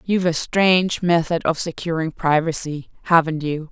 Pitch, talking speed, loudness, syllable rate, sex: 165 Hz, 145 wpm, -20 LUFS, 5.0 syllables/s, female